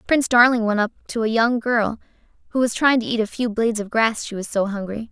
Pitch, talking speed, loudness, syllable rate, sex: 225 Hz, 260 wpm, -20 LUFS, 6.1 syllables/s, female